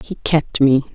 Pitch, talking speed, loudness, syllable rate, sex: 145 Hz, 190 wpm, -16 LUFS, 4.0 syllables/s, female